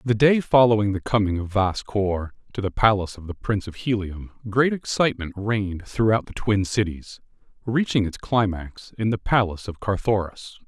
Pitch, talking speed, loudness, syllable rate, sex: 105 Hz, 175 wpm, -23 LUFS, 5.2 syllables/s, male